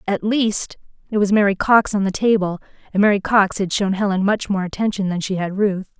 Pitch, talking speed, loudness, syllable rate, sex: 200 Hz, 220 wpm, -19 LUFS, 5.5 syllables/s, female